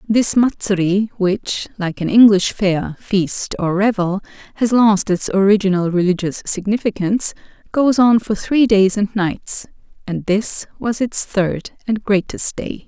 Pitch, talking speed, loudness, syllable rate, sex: 205 Hz, 145 wpm, -17 LUFS, 4.1 syllables/s, female